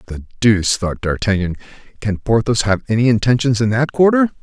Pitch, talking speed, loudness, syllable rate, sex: 115 Hz, 165 wpm, -16 LUFS, 5.6 syllables/s, male